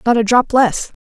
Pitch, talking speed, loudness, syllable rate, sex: 230 Hz, 230 wpm, -14 LUFS, 4.8 syllables/s, female